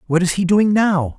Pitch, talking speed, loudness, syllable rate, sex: 180 Hz, 255 wpm, -16 LUFS, 4.9 syllables/s, male